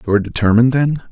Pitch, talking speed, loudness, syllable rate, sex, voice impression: 120 Hz, 215 wpm, -14 LUFS, 8.7 syllables/s, male, masculine, middle-aged, thick, tensed, powerful, slightly hard, clear, intellectual, calm, wild, lively, strict